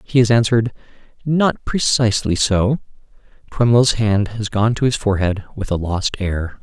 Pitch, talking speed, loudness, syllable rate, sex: 110 Hz, 155 wpm, -18 LUFS, 4.8 syllables/s, male